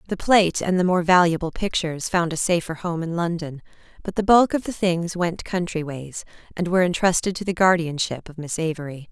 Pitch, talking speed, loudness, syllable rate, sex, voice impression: 175 Hz, 205 wpm, -22 LUFS, 5.6 syllables/s, female, feminine, adult-like, fluent, slightly intellectual